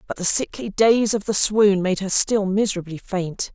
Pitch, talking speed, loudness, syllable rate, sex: 200 Hz, 205 wpm, -20 LUFS, 4.7 syllables/s, female